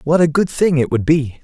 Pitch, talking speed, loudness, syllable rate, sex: 150 Hz, 295 wpm, -16 LUFS, 5.3 syllables/s, male